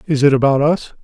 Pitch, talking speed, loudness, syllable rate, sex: 145 Hz, 230 wpm, -14 LUFS, 6.0 syllables/s, male